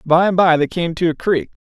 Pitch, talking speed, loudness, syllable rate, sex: 170 Hz, 285 wpm, -16 LUFS, 5.6 syllables/s, male